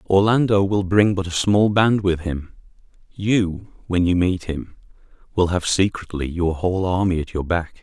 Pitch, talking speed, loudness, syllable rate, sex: 90 Hz, 175 wpm, -20 LUFS, 4.6 syllables/s, male